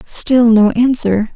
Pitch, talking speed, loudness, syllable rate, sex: 230 Hz, 135 wpm, -12 LUFS, 3.2 syllables/s, female